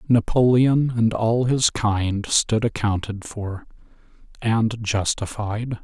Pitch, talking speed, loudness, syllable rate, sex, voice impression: 110 Hz, 95 wpm, -21 LUFS, 3.3 syllables/s, male, masculine, slightly old, slightly thick, slightly muffled, slightly calm, slightly mature, slightly elegant